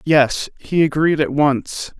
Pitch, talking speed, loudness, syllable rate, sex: 150 Hz, 150 wpm, -18 LUFS, 3.4 syllables/s, male